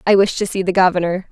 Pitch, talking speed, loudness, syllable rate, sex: 185 Hz, 275 wpm, -16 LUFS, 6.7 syllables/s, female